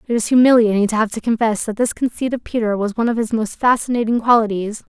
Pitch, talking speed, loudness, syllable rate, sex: 225 Hz, 230 wpm, -17 LUFS, 6.6 syllables/s, female